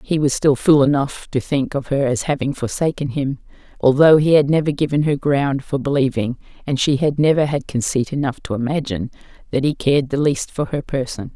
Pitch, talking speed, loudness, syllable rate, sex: 140 Hz, 205 wpm, -18 LUFS, 5.5 syllables/s, female